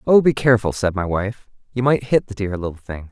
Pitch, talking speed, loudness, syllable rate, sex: 110 Hz, 250 wpm, -19 LUFS, 5.8 syllables/s, male